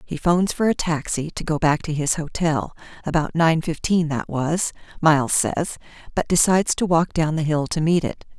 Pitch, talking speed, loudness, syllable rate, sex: 160 Hz, 185 wpm, -21 LUFS, 5.1 syllables/s, female